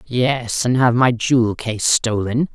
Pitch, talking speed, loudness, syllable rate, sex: 120 Hz, 165 wpm, -17 LUFS, 3.7 syllables/s, female